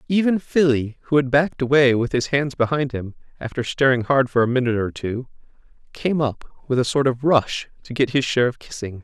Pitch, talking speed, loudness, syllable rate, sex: 130 Hz, 215 wpm, -20 LUFS, 5.6 syllables/s, male